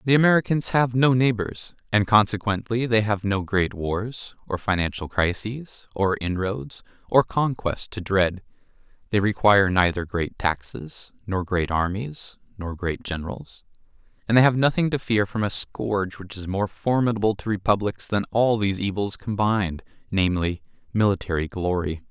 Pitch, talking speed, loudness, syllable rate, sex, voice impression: 100 Hz, 150 wpm, -23 LUFS, 4.8 syllables/s, male, very masculine, very adult-like, very thick, very tensed, powerful, slightly dark, hard, clear, fluent, slightly raspy, cool, very intellectual, refreshing, very sincere, calm, mature, very friendly, reassuring, unique, elegant, slightly wild, sweet, slightly lively, kind, slightly modest